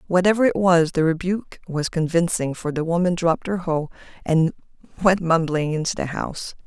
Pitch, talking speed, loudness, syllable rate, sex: 170 Hz, 170 wpm, -21 LUFS, 5.4 syllables/s, female